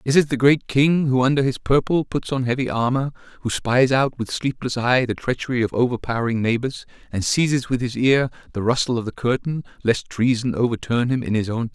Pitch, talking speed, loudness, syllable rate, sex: 125 Hz, 215 wpm, -21 LUFS, 5.7 syllables/s, male